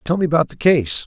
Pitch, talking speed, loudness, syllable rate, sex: 150 Hz, 280 wpm, -17 LUFS, 6.2 syllables/s, male